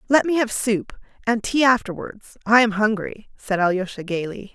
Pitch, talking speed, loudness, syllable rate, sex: 215 Hz, 170 wpm, -21 LUFS, 5.0 syllables/s, female